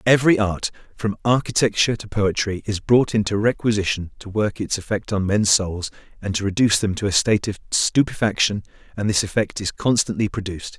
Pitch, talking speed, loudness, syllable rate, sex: 105 Hz, 180 wpm, -21 LUFS, 5.8 syllables/s, male